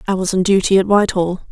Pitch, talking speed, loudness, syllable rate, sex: 190 Hz, 235 wpm, -15 LUFS, 6.9 syllables/s, female